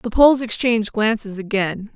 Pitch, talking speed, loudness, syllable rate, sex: 220 Hz, 155 wpm, -19 LUFS, 5.3 syllables/s, female